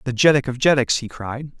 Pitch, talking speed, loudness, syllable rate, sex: 130 Hz, 225 wpm, -19 LUFS, 5.7 syllables/s, male